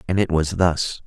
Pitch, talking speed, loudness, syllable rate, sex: 85 Hz, 225 wpm, -21 LUFS, 4.4 syllables/s, male